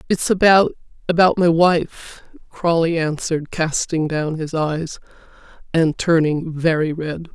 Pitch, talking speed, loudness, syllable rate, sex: 165 Hz, 115 wpm, -18 LUFS, 4.0 syllables/s, female